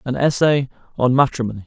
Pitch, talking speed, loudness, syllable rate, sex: 130 Hz, 145 wpm, -18 LUFS, 6.3 syllables/s, male